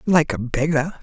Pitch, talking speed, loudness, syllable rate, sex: 145 Hz, 175 wpm, -21 LUFS, 4.5 syllables/s, male